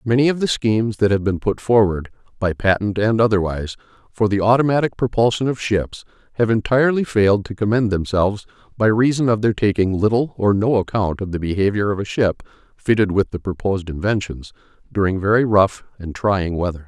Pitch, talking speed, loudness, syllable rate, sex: 105 Hz, 180 wpm, -19 LUFS, 5.8 syllables/s, male